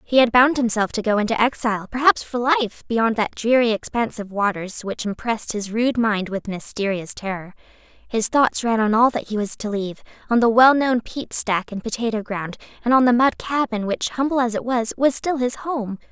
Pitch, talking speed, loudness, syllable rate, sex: 230 Hz, 215 wpm, -20 LUFS, 5.1 syllables/s, female